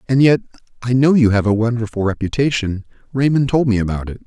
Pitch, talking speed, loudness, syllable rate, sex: 120 Hz, 185 wpm, -17 LUFS, 6.2 syllables/s, male